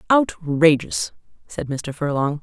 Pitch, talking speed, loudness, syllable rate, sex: 160 Hz, 100 wpm, -21 LUFS, 3.7 syllables/s, female